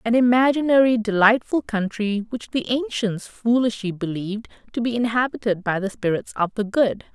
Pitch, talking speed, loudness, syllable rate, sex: 225 Hz, 150 wpm, -21 LUFS, 5.2 syllables/s, female